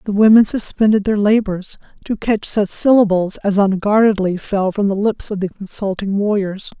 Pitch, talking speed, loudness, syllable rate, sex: 205 Hz, 170 wpm, -16 LUFS, 4.9 syllables/s, female